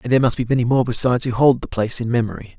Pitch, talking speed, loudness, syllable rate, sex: 120 Hz, 300 wpm, -18 LUFS, 8.0 syllables/s, male